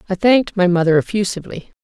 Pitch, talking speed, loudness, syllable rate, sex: 190 Hz, 165 wpm, -16 LUFS, 7.0 syllables/s, female